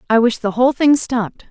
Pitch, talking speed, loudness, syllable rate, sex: 240 Hz, 240 wpm, -16 LUFS, 6.2 syllables/s, female